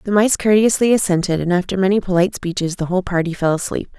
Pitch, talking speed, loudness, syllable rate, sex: 190 Hz, 210 wpm, -17 LUFS, 6.8 syllables/s, female